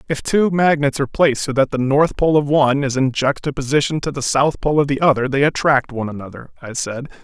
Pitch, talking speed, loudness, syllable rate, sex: 140 Hz, 230 wpm, -17 LUFS, 6.0 syllables/s, male